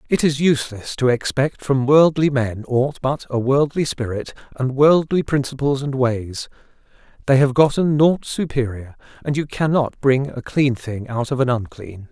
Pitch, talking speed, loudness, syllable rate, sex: 135 Hz, 170 wpm, -19 LUFS, 4.6 syllables/s, male